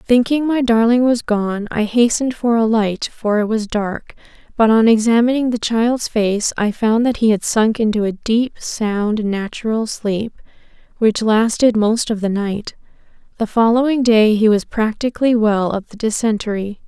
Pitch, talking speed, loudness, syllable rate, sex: 225 Hz, 170 wpm, -16 LUFS, 4.5 syllables/s, female